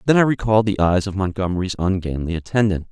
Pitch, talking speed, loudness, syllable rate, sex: 95 Hz, 185 wpm, -20 LUFS, 6.6 syllables/s, male